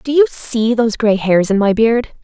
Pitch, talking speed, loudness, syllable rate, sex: 225 Hz, 240 wpm, -14 LUFS, 4.8 syllables/s, female